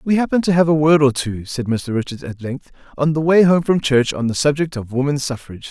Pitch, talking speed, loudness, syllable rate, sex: 140 Hz, 265 wpm, -17 LUFS, 6.0 syllables/s, male